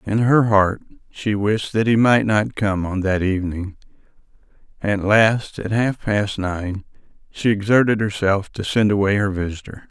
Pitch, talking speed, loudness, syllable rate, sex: 105 Hz, 165 wpm, -19 LUFS, 4.4 syllables/s, male